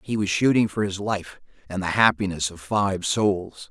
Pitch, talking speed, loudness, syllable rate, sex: 95 Hz, 195 wpm, -23 LUFS, 4.5 syllables/s, male